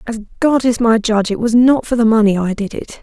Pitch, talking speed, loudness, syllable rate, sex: 230 Hz, 280 wpm, -14 LUFS, 5.9 syllables/s, female